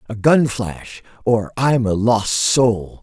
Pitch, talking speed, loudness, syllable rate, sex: 115 Hz, 120 wpm, -17 LUFS, 3.1 syllables/s, male